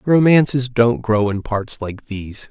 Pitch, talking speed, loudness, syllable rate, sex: 120 Hz, 170 wpm, -17 LUFS, 4.2 syllables/s, male